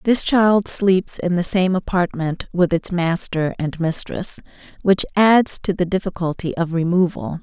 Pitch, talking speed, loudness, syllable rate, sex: 180 Hz, 155 wpm, -19 LUFS, 4.2 syllables/s, female